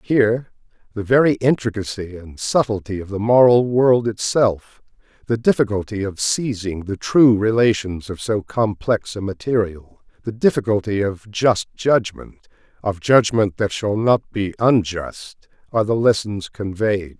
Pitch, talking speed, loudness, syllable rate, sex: 105 Hz, 135 wpm, -19 LUFS, 4.4 syllables/s, male